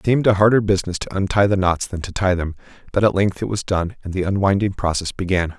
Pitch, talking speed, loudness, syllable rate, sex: 95 Hz, 260 wpm, -19 LUFS, 6.5 syllables/s, male